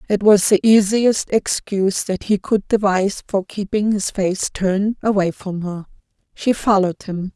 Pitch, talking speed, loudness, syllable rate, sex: 200 Hz, 165 wpm, -18 LUFS, 4.6 syllables/s, female